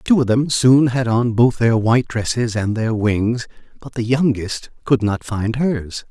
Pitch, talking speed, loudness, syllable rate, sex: 120 Hz, 195 wpm, -18 LUFS, 4.2 syllables/s, male